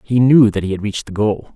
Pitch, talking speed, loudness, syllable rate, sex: 110 Hz, 310 wpm, -15 LUFS, 6.3 syllables/s, male